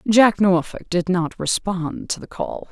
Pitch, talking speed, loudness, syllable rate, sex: 190 Hz, 175 wpm, -21 LUFS, 3.9 syllables/s, female